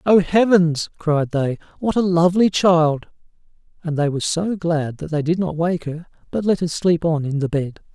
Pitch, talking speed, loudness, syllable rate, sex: 165 Hz, 205 wpm, -19 LUFS, 4.8 syllables/s, male